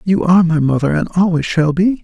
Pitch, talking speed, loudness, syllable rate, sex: 165 Hz, 235 wpm, -14 LUFS, 5.7 syllables/s, male